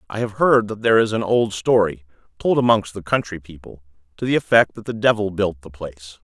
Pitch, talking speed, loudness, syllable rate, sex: 100 Hz, 220 wpm, -19 LUFS, 5.8 syllables/s, male